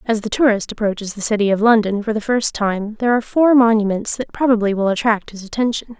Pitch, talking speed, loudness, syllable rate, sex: 220 Hz, 220 wpm, -17 LUFS, 6.2 syllables/s, female